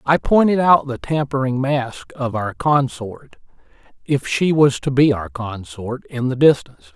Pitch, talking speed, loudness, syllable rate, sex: 130 Hz, 145 wpm, -18 LUFS, 4.4 syllables/s, male